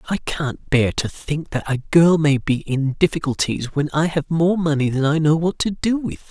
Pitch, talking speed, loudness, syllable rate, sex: 150 Hz, 230 wpm, -20 LUFS, 4.6 syllables/s, male